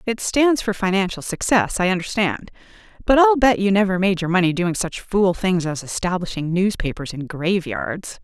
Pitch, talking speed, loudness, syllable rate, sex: 190 Hz, 175 wpm, -20 LUFS, 4.9 syllables/s, female